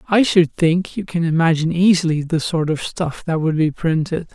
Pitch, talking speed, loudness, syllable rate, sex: 170 Hz, 205 wpm, -18 LUFS, 5.1 syllables/s, male